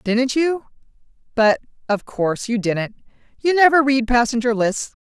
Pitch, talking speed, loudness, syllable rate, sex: 245 Hz, 120 wpm, -19 LUFS, 4.5 syllables/s, female